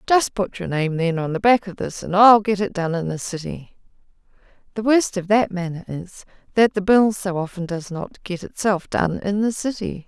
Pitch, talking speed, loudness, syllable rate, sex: 195 Hz, 220 wpm, -20 LUFS, 4.9 syllables/s, female